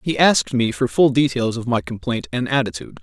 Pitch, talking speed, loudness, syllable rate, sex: 130 Hz, 220 wpm, -19 LUFS, 5.9 syllables/s, male